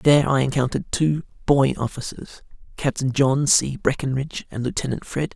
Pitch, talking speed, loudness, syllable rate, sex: 135 Hz, 145 wpm, -22 LUFS, 5.4 syllables/s, male